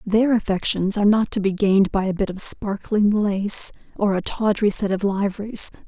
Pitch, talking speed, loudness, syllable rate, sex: 200 Hz, 195 wpm, -20 LUFS, 5.0 syllables/s, female